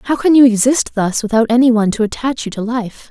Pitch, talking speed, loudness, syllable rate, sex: 235 Hz, 250 wpm, -14 LUFS, 5.9 syllables/s, female